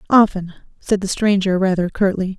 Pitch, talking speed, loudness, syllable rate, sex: 190 Hz, 150 wpm, -18 LUFS, 5.2 syllables/s, female